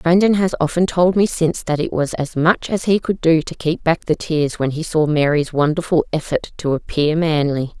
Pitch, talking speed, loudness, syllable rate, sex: 160 Hz, 225 wpm, -18 LUFS, 5.0 syllables/s, female